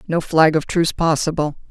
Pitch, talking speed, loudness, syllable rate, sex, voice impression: 160 Hz, 175 wpm, -18 LUFS, 5.5 syllables/s, female, feminine, middle-aged, tensed, powerful, clear, fluent, intellectual, elegant, lively, slightly strict, sharp